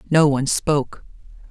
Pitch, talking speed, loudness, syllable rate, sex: 145 Hz, 120 wpm, -19 LUFS, 5.8 syllables/s, female